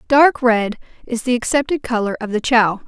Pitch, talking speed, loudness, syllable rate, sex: 240 Hz, 190 wpm, -17 LUFS, 5.0 syllables/s, female